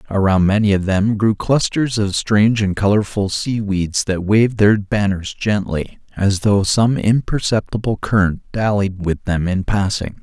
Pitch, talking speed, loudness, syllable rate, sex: 100 Hz, 155 wpm, -17 LUFS, 4.4 syllables/s, male